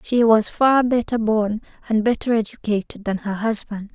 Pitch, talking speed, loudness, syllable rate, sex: 220 Hz, 165 wpm, -20 LUFS, 4.8 syllables/s, female